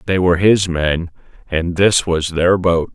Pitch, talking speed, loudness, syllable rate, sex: 85 Hz, 185 wpm, -16 LUFS, 4.2 syllables/s, male